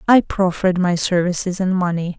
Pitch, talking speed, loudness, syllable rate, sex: 180 Hz, 165 wpm, -18 LUFS, 5.4 syllables/s, female